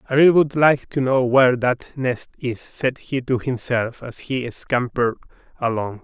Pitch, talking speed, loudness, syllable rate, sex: 125 Hz, 180 wpm, -20 LUFS, 4.5 syllables/s, male